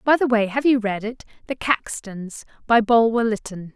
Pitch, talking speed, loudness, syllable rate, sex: 225 Hz, 175 wpm, -20 LUFS, 4.7 syllables/s, female